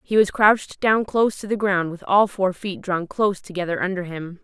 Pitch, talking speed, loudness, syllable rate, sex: 190 Hz, 230 wpm, -21 LUFS, 5.3 syllables/s, female